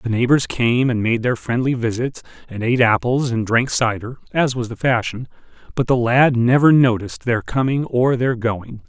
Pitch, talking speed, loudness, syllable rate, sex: 120 Hz, 190 wpm, -18 LUFS, 4.9 syllables/s, male